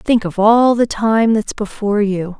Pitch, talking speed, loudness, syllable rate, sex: 215 Hz, 200 wpm, -15 LUFS, 4.3 syllables/s, female